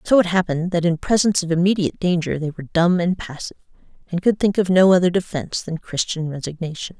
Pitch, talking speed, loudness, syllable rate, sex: 175 Hz, 205 wpm, -20 LUFS, 6.6 syllables/s, female